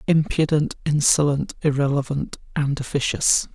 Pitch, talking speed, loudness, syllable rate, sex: 145 Hz, 85 wpm, -21 LUFS, 4.6 syllables/s, male